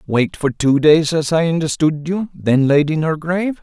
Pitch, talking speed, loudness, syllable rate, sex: 155 Hz, 215 wpm, -16 LUFS, 5.0 syllables/s, male